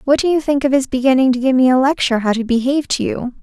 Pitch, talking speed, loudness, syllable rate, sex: 260 Hz, 300 wpm, -15 LUFS, 7.1 syllables/s, female